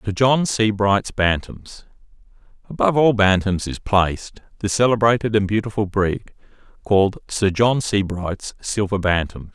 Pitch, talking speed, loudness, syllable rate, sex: 105 Hz, 120 wpm, -19 LUFS, 4.5 syllables/s, male